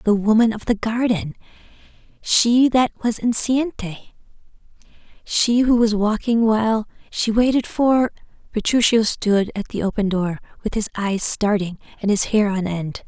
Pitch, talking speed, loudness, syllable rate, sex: 220 Hz, 135 wpm, -19 LUFS, 4.4 syllables/s, female